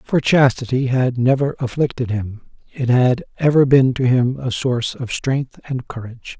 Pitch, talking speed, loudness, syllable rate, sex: 125 Hz, 170 wpm, -18 LUFS, 4.7 syllables/s, male